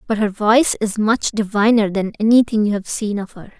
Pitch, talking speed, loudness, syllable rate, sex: 215 Hz, 215 wpm, -17 LUFS, 5.5 syllables/s, female